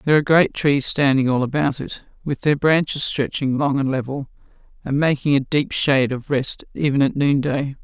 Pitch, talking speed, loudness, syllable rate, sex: 140 Hz, 190 wpm, -19 LUFS, 5.3 syllables/s, female